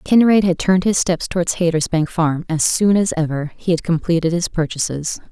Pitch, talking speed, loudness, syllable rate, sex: 170 Hz, 190 wpm, -17 LUFS, 5.3 syllables/s, female